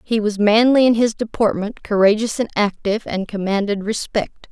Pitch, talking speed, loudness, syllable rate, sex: 215 Hz, 160 wpm, -18 LUFS, 5.1 syllables/s, female